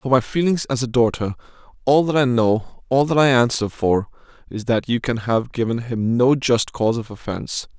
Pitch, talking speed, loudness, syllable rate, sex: 120 Hz, 210 wpm, -20 LUFS, 5.1 syllables/s, male